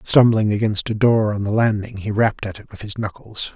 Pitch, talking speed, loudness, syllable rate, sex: 105 Hz, 235 wpm, -19 LUFS, 5.5 syllables/s, male